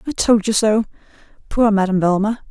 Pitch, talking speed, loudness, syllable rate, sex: 210 Hz, 170 wpm, -17 LUFS, 5.9 syllables/s, female